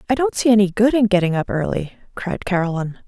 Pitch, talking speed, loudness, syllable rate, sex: 200 Hz, 215 wpm, -18 LUFS, 6.3 syllables/s, female